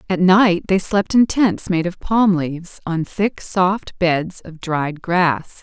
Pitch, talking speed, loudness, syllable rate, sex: 180 Hz, 180 wpm, -18 LUFS, 3.4 syllables/s, female